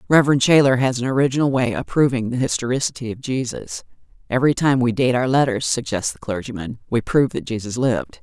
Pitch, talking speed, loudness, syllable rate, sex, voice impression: 130 Hz, 190 wpm, -20 LUFS, 6.3 syllables/s, female, feminine, middle-aged, tensed, powerful, hard, clear, fluent, intellectual, elegant, lively, strict, sharp